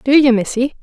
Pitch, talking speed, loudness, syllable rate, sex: 255 Hz, 215 wpm, -14 LUFS, 5.3 syllables/s, female